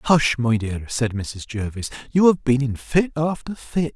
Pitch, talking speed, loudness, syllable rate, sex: 130 Hz, 195 wpm, -22 LUFS, 4.2 syllables/s, male